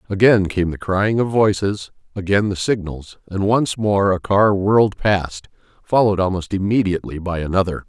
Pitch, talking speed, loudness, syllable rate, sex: 100 Hz, 160 wpm, -18 LUFS, 5.0 syllables/s, male